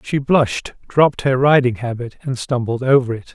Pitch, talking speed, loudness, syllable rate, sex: 130 Hz, 180 wpm, -17 LUFS, 5.2 syllables/s, male